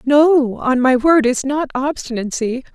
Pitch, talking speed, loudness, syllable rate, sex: 265 Hz, 155 wpm, -16 LUFS, 4.0 syllables/s, female